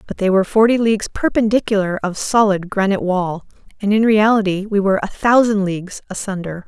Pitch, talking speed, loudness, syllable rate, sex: 205 Hz, 170 wpm, -17 LUFS, 6.0 syllables/s, female